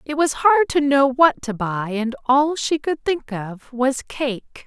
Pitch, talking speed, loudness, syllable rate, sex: 270 Hz, 205 wpm, -20 LUFS, 3.6 syllables/s, female